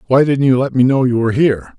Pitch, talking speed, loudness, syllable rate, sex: 130 Hz, 305 wpm, -14 LUFS, 6.9 syllables/s, male